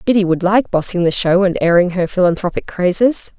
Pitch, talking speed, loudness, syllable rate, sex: 185 Hz, 195 wpm, -15 LUFS, 5.6 syllables/s, female